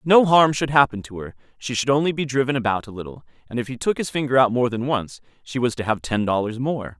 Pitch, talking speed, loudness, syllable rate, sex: 125 Hz, 265 wpm, -21 LUFS, 6.1 syllables/s, male